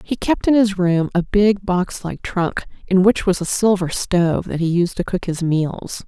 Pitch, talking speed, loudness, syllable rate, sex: 185 Hz, 225 wpm, -18 LUFS, 4.4 syllables/s, female